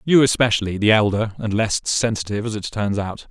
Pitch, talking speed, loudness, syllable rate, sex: 110 Hz, 200 wpm, -20 LUFS, 5.8 syllables/s, male